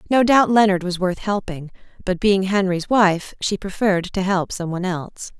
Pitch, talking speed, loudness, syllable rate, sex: 190 Hz, 180 wpm, -19 LUFS, 5.0 syllables/s, female